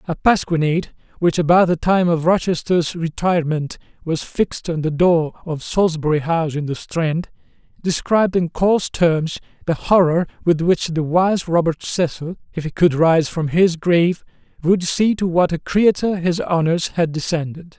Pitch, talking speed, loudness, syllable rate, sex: 170 Hz, 165 wpm, -18 LUFS, 4.9 syllables/s, male